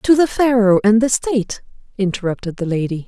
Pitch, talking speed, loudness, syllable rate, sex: 220 Hz, 175 wpm, -17 LUFS, 5.6 syllables/s, female